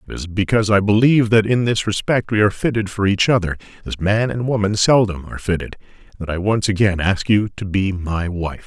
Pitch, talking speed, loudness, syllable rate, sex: 100 Hz, 220 wpm, -18 LUFS, 5.8 syllables/s, male